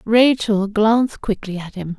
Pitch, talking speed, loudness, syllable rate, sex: 210 Hz, 150 wpm, -18 LUFS, 4.2 syllables/s, female